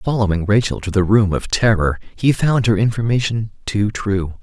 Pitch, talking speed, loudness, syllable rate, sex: 105 Hz, 175 wpm, -18 LUFS, 4.8 syllables/s, male